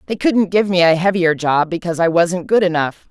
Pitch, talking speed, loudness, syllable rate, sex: 180 Hz, 230 wpm, -16 LUFS, 5.5 syllables/s, female